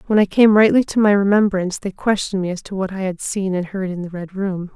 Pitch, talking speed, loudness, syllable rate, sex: 195 Hz, 280 wpm, -18 LUFS, 6.1 syllables/s, female